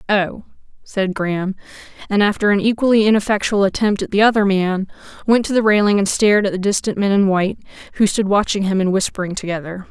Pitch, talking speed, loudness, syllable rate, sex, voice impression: 200 Hz, 195 wpm, -17 LUFS, 6.2 syllables/s, female, feminine, adult-like, calm, slightly unique